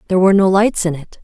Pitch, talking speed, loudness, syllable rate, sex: 185 Hz, 290 wpm, -14 LUFS, 7.8 syllables/s, female